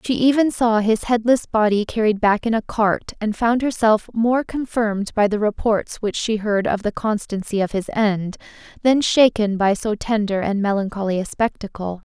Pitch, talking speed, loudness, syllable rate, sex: 215 Hz, 185 wpm, -20 LUFS, 4.8 syllables/s, female